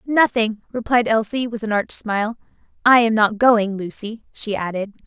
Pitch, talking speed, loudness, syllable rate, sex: 220 Hz, 165 wpm, -19 LUFS, 4.7 syllables/s, female